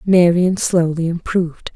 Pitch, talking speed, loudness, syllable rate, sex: 175 Hz, 105 wpm, -17 LUFS, 4.2 syllables/s, female